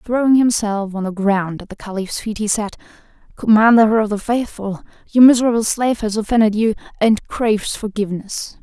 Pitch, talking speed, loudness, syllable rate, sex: 215 Hz, 165 wpm, -17 LUFS, 5.4 syllables/s, female